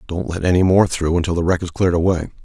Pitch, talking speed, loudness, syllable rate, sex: 85 Hz, 270 wpm, -18 LUFS, 6.8 syllables/s, male